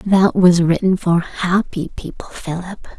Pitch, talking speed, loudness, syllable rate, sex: 180 Hz, 140 wpm, -17 LUFS, 4.3 syllables/s, female